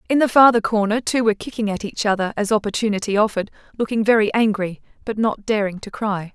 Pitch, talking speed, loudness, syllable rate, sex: 215 Hz, 200 wpm, -19 LUFS, 6.4 syllables/s, female